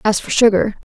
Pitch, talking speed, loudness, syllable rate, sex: 210 Hz, 190 wpm, -16 LUFS, 5.9 syllables/s, female